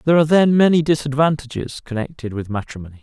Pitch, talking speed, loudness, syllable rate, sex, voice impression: 140 Hz, 160 wpm, -18 LUFS, 7.0 syllables/s, male, very masculine, very adult-like, slightly thick, cool, slightly intellectual